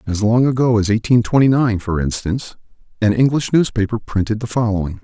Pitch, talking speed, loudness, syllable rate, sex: 110 Hz, 180 wpm, -17 LUFS, 5.8 syllables/s, male